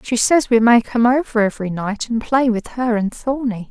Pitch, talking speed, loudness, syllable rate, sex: 235 Hz, 225 wpm, -17 LUFS, 5.0 syllables/s, female